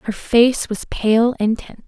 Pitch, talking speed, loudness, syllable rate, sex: 225 Hz, 190 wpm, -17 LUFS, 4.1 syllables/s, female